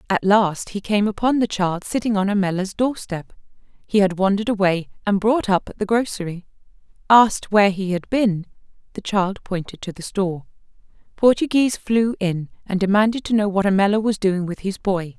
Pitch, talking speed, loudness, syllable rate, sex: 200 Hz, 180 wpm, -20 LUFS, 5.4 syllables/s, female